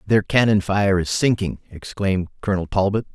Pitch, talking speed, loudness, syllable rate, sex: 100 Hz, 155 wpm, -20 LUFS, 5.5 syllables/s, male